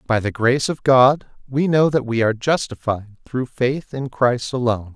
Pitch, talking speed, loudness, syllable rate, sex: 125 Hz, 195 wpm, -19 LUFS, 4.9 syllables/s, male